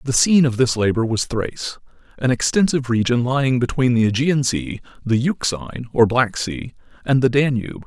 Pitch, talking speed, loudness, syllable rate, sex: 125 Hz, 175 wpm, -19 LUFS, 5.6 syllables/s, male